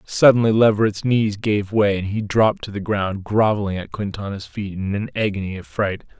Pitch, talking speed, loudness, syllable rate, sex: 105 Hz, 195 wpm, -20 LUFS, 5.2 syllables/s, male